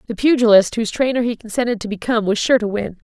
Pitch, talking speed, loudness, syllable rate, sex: 225 Hz, 230 wpm, -17 LUFS, 7.0 syllables/s, female